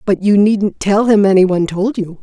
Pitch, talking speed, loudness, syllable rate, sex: 200 Hz, 245 wpm, -13 LUFS, 5.2 syllables/s, female